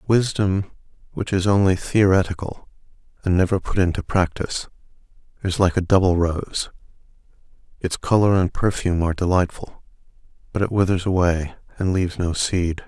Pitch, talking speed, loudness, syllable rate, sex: 90 Hz, 135 wpm, -21 LUFS, 5.4 syllables/s, male